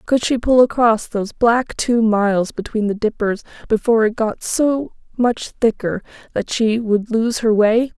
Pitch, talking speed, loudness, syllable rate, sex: 225 Hz, 175 wpm, -18 LUFS, 4.4 syllables/s, female